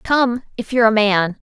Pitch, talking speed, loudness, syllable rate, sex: 225 Hz, 160 wpm, -17 LUFS, 5.0 syllables/s, female